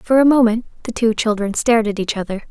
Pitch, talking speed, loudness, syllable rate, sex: 225 Hz, 240 wpm, -17 LUFS, 5.8 syllables/s, female